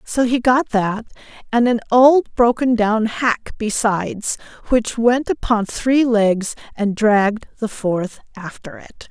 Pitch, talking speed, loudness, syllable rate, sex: 225 Hz, 145 wpm, -17 LUFS, 3.7 syllables/s, female